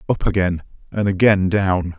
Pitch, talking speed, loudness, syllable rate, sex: 95 Hz, 150 wpm, -18 LUFS, 4.6 syllables/s, male